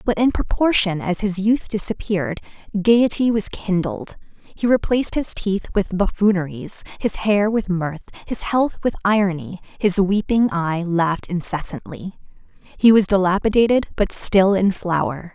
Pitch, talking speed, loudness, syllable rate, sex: 195 Hz, 140 wpm, -20 LUFS, 4.6 syllables/s, female